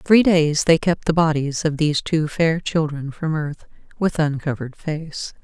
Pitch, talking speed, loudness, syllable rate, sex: 155 Hz, 175 wpm, -20 LUFS, 4.5 syllables/s, female